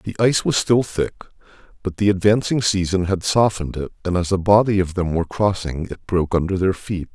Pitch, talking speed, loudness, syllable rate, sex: 95 Hz, 210 wpm, -20 LUFS, 5.8 syllables/s, male